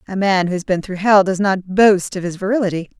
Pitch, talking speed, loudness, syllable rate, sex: 190 Hz, 260 wpm, -17 LUFS, 5.8 syllables/s, female